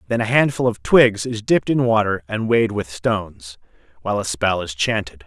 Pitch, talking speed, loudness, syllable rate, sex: 105 Hz, 205 wpm, -19 LUFS, 5.5 syllables/s, male